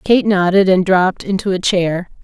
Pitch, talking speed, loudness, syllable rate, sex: 185 Hz, 190 wpm, -14 LUFS, 4.9 syllables/s, female